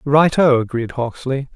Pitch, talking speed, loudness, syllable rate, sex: 135 Hz, 155 wpm, -17 LUFS, 4.2 syllables/s, male